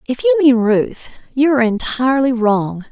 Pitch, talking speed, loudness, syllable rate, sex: 250 Hz, 165 wpm, -15 LUFS, 5.1 syllables/s, female